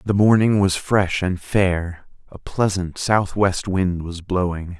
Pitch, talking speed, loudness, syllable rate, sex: 95 Hz, 150 wpm, -20 LUFS, 3.6 syllables/s, male